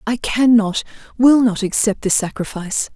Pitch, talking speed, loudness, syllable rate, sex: 220 Hz, 140 wpm, -16 LUFS, 4.8 syllables/s, female